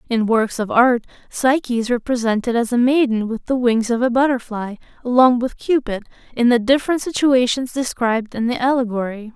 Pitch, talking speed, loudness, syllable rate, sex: 240 Hz, 175 wpm, -18 LUFS, 5.4 syllables/s, female